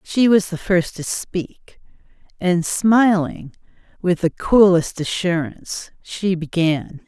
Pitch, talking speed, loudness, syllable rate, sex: 180 Hz, 120 wpm, -19 LUFS, 3.4 syllables/s, female